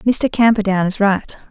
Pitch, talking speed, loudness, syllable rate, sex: 205 Hz, 160 wpm, -16 LUFS, 4.4 syllables/s, female